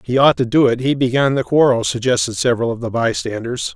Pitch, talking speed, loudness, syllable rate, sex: 125 Hz, 225 wpm, -17 LUFS, 6.0 syllables/s, male